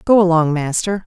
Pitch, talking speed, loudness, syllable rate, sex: 175 Hz, 160 wpm, -16 LUFS, 5.1 syllables/s, female